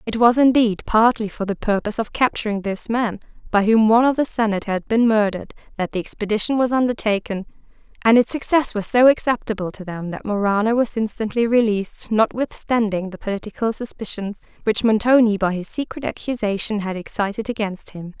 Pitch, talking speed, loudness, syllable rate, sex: 220 Hz, 170 wpm, -20 LUFS, 5.8 syllables/s, female